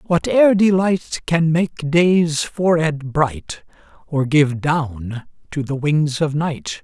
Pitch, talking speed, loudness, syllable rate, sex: 155 Hz, 130 wpm, -18 LUFS, 3.3 syllables/s, male